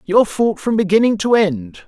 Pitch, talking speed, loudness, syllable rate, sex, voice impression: 200 Hz, 190 wpm, -16 LUFS, 4.7 syllables/s, male, masculine, middle-aged, tensed, powerful, bright, raspy, slightly calm, mature, friendly, wild, lively, strict, intense